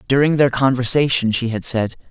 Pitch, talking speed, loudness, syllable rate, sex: 125 Hz, 170 wpm, -17 LUFS, 5.4 syllables/s, male